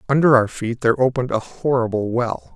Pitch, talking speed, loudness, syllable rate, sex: 120 Hz, 190 wpm, -19 LUFS, 5.9 syllables/s, male